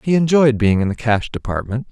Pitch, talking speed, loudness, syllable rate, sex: 125 Hz, 220 wpm, -17 LUFS, 5.6 syllables/s, male